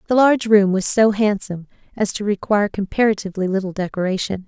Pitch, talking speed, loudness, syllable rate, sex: 200 Hz, 160 wpm, -19 LUFS, 6.5 syllables/s, female